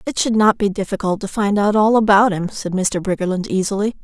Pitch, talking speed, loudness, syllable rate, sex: 205 Hz, 225 wpm, -17 LUFS, 5.7 syllables/s, female